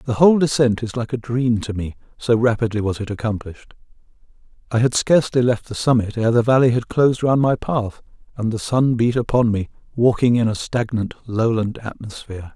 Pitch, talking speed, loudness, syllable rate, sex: 115 Hz, 190 wpm, -19 LUFS, 5.6 syllables/s, male